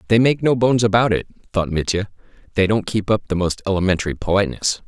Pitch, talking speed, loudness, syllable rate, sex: 100 Hz, 195 wpm, -19 LUFS, 6.4 syllables/s, male